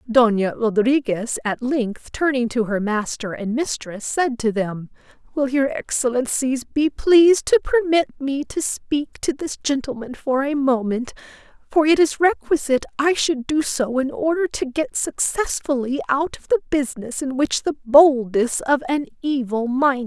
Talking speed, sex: 175 wpm, female